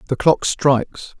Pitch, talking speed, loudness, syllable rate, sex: 135 Hz, 150 wpm, -17 LUFS, 4.1 syllables/s, male